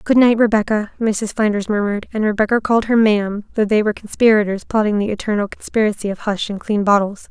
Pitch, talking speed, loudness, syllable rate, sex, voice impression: 210 Hz, 195 wpm, -17 LUFS, 6.2 syllables/s, female, feminine, slightly adult-like, fluent, slightly refreshing, slightly sincere, friendly